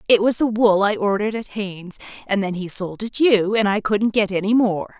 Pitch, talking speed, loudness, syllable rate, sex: 205 Hz, 240 wpm, -19 LUFS, 5.3 syllables/s, female